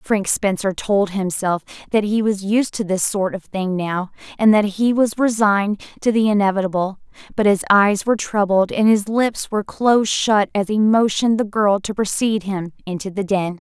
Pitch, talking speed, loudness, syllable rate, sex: 205 Hz, 195 wpm, -18 LUFS, 5.0 syllables/s, female